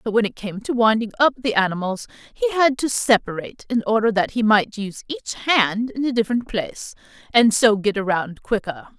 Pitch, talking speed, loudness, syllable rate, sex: 220 Hz, 200 wpm, -20 LUFS, 5.5 syllables/s, female